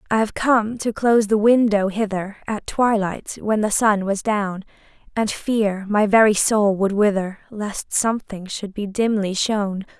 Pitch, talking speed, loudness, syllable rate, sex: 210 Hz, 160 wpm, -20 LUFS, 4.2 syllables/s, female